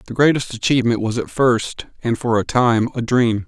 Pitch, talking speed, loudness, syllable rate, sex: 120 Hz, 205 wpm, -18 LUFS, 5.1 syllables/s, male